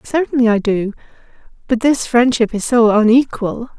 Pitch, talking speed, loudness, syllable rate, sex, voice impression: 235 Hz, 125 wpm, -15 LUFS, 4.9 syllables/s, female, feminine, slightly adult-like, slightly fluent, slightly calm, friendly, reassuring, slightly kind